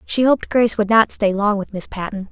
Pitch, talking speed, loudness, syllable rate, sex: 210 Hz, 260 wpm, -18 LUFS, 5.9 syllables/s, female